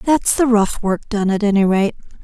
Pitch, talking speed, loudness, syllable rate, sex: 215 Hz, 215 wpm, -17 LUFS, 4.9 syllables/s, female